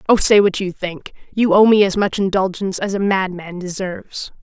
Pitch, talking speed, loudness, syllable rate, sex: 190 Hz, 205 wpm, -17 LUFS, 5.3 syllables/s, female